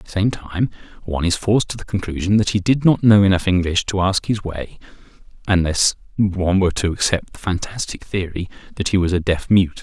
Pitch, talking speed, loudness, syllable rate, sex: 95 Hz, 215 wpm, -19 LUFS, 5.8 syllables/s, male